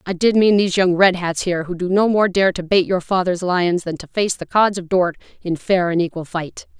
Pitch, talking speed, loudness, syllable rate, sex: 180 Hz, 265 wpm, -18 LUFS, 5.4 syllables/s, female